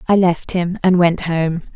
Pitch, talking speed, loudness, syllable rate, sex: 175 Hz, 205 wpm, -17 LUFS, 4.1 syllables/s, female